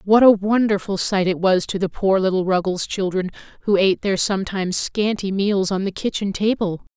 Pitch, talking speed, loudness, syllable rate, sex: 195 Hz, 190 wpm, -20 LUFS, 5.3 syllables/s, female